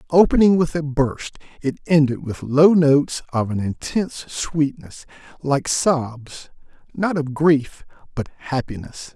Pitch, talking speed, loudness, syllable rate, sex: 145 Hz, 130 wpm, -19 LUFS, 4.0 syllables/s, male